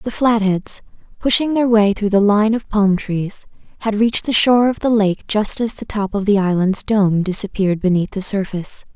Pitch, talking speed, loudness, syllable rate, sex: 205 Hz, 200 wpm, -17 LUFS, 5.1 syllables/s, female